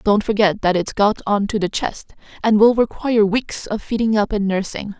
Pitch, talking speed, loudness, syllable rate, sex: 210 Hz, 215 wpm, -18 LUFS, 5.1 syllables/s, female